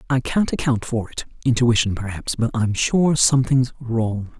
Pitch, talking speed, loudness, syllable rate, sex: 120 Hz, 135 wpm, -20 LUFS, 4.6 syllables/s, female